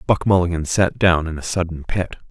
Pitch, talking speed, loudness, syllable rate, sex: 85 Hz, 210 wpm, -19 LUFS, 5.4 syllables/s, male